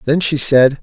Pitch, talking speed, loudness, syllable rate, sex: 145 Hz, 220 wpm, -13 LUFS, 4.4 syllables/s, male